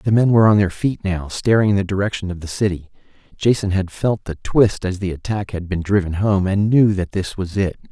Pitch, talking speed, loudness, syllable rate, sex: 95 Hz, 245 wpm, -19 LUFS, 5.5 syllables/s, male